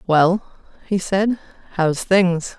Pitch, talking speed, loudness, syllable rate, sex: 185 Hz, 115 wpm, -19 LUFS, 2.9 syllables/s, female